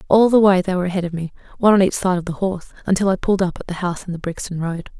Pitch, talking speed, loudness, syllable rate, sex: 185 Hz, 310 wpm, -19 LUFS, 7.9 syllables/s, female